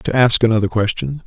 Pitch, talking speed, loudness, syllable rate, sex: 115 Hz, 190 wpm, -16 LUFS, 5.7 syllables/s, male